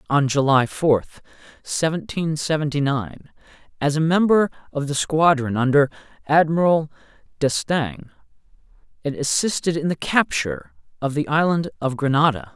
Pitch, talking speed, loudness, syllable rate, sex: 145 Hz, 120 wpm, -21 LUFS, 4.7 syllables/s, male